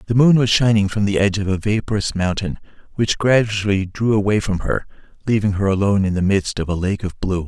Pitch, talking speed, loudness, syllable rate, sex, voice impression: 100 Hz, 225 wpm, -18 LUFS, 6.0 syllables/s, male, very masculine, very adult-like, slightly thick, cool, slightly sincere, slightly wild